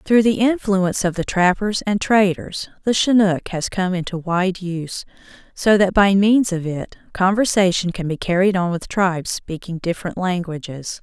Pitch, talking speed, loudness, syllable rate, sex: 185 Hz, 170 wpm, -19 LUFS, 4.7 syllables/s, female